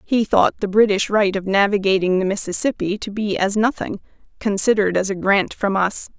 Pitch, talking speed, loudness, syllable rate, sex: 200 Hz, 185 wpm, -19 LUFS, 5.4 syllables/s, female